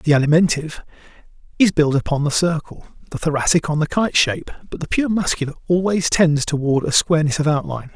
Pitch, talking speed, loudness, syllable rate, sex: 160 Hz, 180 wpm, -18 LUFS, 6.3 syllables/s, male